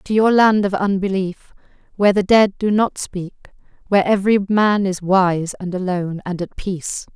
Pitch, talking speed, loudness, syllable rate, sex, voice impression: 195 Hz, 170 wpm, -18 LUFS, 4.9 syllables/s, female, feminine, adult-like, calm, slightly elegant, slightly sweet